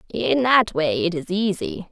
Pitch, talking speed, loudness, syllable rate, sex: 190 Hz, 190 wpm, -20 LUFS, 4.2 syllables/s, female